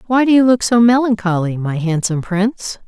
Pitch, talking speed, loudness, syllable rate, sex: 210 Hz, 190 wpm, -15 LUFS, 5.6 syllables/s, female